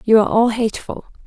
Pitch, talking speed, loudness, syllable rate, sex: 225 Hz, 145 wpm, -16 LUFS, 6.2 syllables/s, female